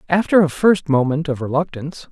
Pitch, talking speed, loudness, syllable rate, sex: 155 Hz, 170 wpm, -17 LUFS, 5.7 syllables/s, male